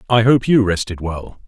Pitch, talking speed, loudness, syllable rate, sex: 105 Hz, 205 wpm, -16 LUFS, 4.8 syllables/s, male